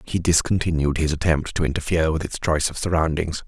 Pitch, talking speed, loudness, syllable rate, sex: 80 Hz, 190 wpm, -22 LUFS, 6.3 syllables/s, male